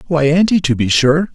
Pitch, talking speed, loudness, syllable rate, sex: 155 Hz, 225 wpm, -13 LUFS, 5.1 syllables/s, male